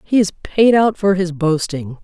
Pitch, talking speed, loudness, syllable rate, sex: 180 Hz, 205 wpm, -16 LUFS, 4.2 syllables/s, female